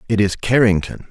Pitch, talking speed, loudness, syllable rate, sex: 105 Hz, 160 wpm, -17 LUFS, 5.4 syllables/s, male